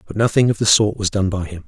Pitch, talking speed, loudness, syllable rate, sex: 100 Hz, 320 wpm, -17 LUFS, 6.6 syllables/s, male